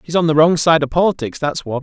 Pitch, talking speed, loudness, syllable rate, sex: 155 Hz, 295 wpm, -15 LUFS, 6.2 syllables/s, male